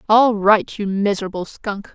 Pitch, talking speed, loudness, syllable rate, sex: 205 Hz, 155 wpm, -18 LUFS, 4.5 syllables/s, female